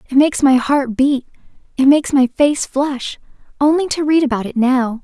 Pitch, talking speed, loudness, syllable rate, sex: 270 Hz, 190 wpm, -15 LUFS, 5.1 syllables/s, female